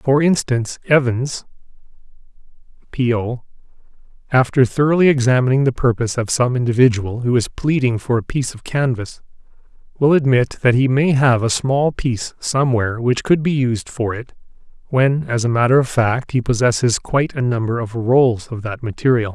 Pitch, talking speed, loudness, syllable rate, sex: 125 Hz, 165 wpm, -17 LUFS, 5.3 syllables/s, male